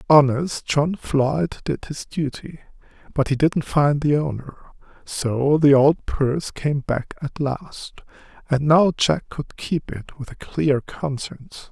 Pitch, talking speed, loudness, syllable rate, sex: 145 Hz, 155 wpm, -21 LUFS, 3.7 syllables/s, male